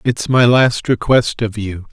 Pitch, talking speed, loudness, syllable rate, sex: 115 Hz, 190 wpm, -15 LUFS, 3.9 syllables/s, male